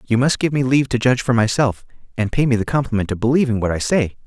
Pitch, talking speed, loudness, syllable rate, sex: 120 Hz, 265 wpm, -18 LUFS, 6.9 syllables/s, male